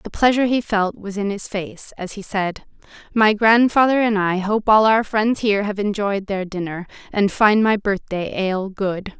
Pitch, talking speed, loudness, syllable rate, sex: 205 Hz, 195 wpm, -19 LUFS, 4.6 syllables/s, female